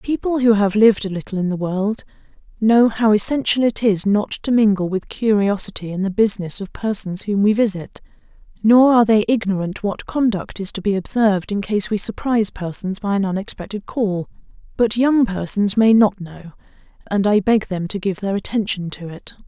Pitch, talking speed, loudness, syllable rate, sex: 205 Hz, 190 wpm, -18 LUFS, 5.3 syllables/s, female